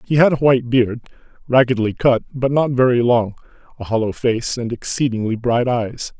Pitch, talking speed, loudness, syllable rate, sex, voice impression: 120 Hz, 175 wpm, -18 LUFS, 5.0 syllables/s, male, very masculine, old, very thick, slightly tensed, very powerful, bright, very soft, very muffled, very fluent, raspy, very cool, intellectual, refreshing, sincere, very calm, very mature, very friendly, very reassuring, very unique, very elegant, wild, very sweet, lively, very kind